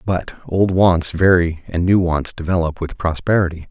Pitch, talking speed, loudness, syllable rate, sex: 85 Hz, 160 wpm, -17 LUFS, 4.6 syllables/s, male